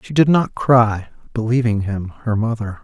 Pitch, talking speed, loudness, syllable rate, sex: 115 Hz, 170 wpm, -18 LUFS, 4.4 syllables/s, male